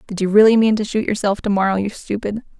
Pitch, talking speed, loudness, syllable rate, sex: 210 Hz, 255 wpm, -17 LUFS, 6.5 syllables/s, female